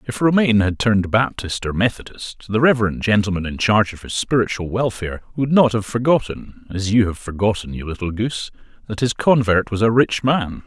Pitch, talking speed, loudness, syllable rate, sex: 105 Hz, 180 wpm, -19 LUFS, 5.7 syllables/s, male